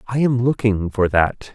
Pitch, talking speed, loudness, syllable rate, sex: 110 Hz, 195 wpm, -19 LUFS, 4.3 syllables/s, male